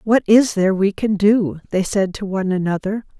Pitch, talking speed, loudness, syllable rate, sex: 200 Hz, 205 wpm, -18 LUFS, 5.3 syllables/s, female